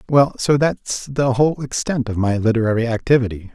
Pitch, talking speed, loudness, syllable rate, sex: 125 Hz, 170 wpm, -18 LUFS, 5.4 syllables/s, male